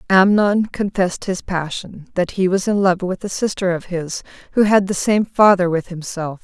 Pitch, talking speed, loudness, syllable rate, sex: 185 Hz, 195 wpm, -18 LUFS, 4.8 syllables/s, female